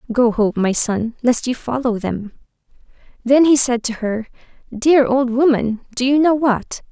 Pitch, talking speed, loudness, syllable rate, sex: 245 Hz, 175 wpm, -17 LUFS, 4.3 syllables/s, female